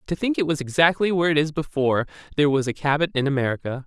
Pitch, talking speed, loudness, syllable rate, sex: 150 Hz, 235 wpm, -22 LUFS, 7.4 syllables/s, male